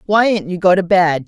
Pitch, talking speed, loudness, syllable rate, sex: 185 Hz, 235 wpm, -14 LUFS, 4.4 syllables/s, female